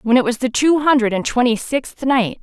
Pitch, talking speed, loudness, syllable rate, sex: 250 Hz, 245 wpm, -17 LUFS, 5.1 syllables/s, female